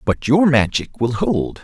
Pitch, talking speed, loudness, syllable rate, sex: 135 Hz, 185 wpm, -17 LUFS, 4.0 syllables/s, male